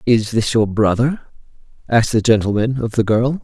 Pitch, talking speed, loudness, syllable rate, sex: 115 Hz, 175 wpm, -17 LUFS, 5.1 syllables/s, male